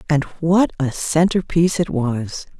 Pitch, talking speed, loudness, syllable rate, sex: 160 Hz, 140 wpm, -19 LUFS, 4.1 syllables/s, female